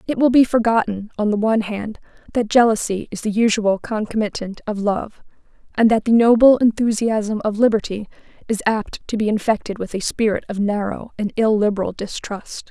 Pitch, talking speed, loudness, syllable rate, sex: 215 Hz, 170 wpm, -19 LUFS, 5.2 syllables/s, female